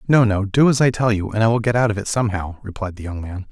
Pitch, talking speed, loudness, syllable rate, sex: 110 Hz, 325 wpm, -19 LUFS, 6.6 syllables/s, male